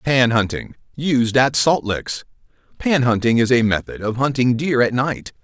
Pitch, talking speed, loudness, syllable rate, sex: 125 Hz, 165 wpm, -18 LUFS, 4.2 syllables/s, male